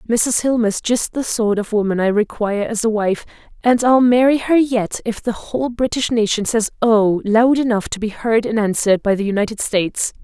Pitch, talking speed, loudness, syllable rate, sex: 225 Hz, 215 wpm, -17 LUFS, 5.3 syllables/s, female